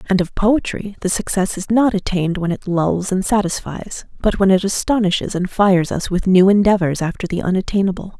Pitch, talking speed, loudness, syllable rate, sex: 190 Hz, 190 wpm, -17 LUFS, 5.5 syllables/s, female